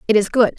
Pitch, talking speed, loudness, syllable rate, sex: 220 Hz, 310 wpm, -17 LUFS, 7.5 syllables/s, female